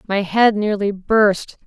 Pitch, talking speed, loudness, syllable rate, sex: 205 Hz, 145 wpm, -17 LUFS, 3.5 syllables/s, female